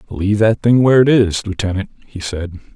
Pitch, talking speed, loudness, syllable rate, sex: 100 Hz, 195 wpm, -15 LUFS, 5.7 syllables/s, male